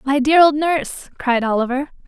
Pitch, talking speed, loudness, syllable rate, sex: 280 Hz, 175 wpm, -17 LUFS, 5.2 syllables/s, female